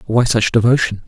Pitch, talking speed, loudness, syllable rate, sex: 115 Hz, 170 wpm, -15 LUFS, 5.4 syllables/s, male